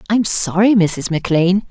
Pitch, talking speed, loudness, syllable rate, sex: 190 Hz, 175 wpm, -15 LUFS, 5.4 syllables/s, female